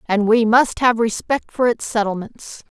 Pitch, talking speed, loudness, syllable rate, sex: 225 Hz, 175 wpm, -18 LUFS, 4.3 syllables/s, female